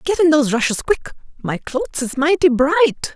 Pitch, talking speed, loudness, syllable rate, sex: 295 Hz, 170 wpm, -17 LUFS, 6.2 syllables/s, female